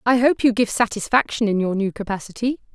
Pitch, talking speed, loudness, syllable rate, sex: 225 Hz, 195 wpm, -20 LUFS, 5.9 syllables/s, female